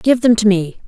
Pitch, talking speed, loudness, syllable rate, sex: 215 Hz, 275 wpm, -14 LUFS, 5.3 syllables/s, female